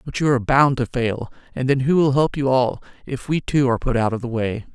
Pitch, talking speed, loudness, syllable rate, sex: 130 Hz, 280 wpm, -20 LUFS, 5.8 syllables/s, female